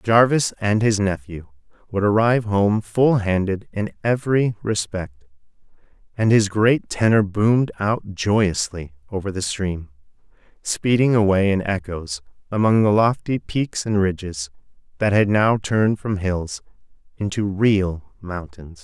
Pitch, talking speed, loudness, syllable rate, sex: 100 Hz, 130 wpm, -20 LUFS, 4.1 syllables/s, male